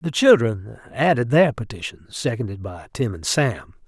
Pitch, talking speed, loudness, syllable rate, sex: 120 Hz, 155 wpm, -20 LUFS, 4.5 syllables/s, male